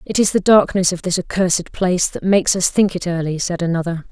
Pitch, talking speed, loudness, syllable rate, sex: 180 Hz, 235 wpm, -17 LUFS, 6.1 syllables/s, female